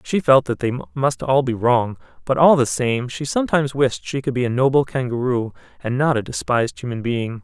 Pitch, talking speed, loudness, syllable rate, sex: 125 Hz, 220 wpm, -19 LUFS, 5.6 syllables/s, male